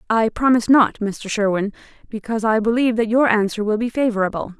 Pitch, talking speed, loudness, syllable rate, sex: 220 Hz, 170 wpm, -19 LUFS, 6.2 syllables/s, female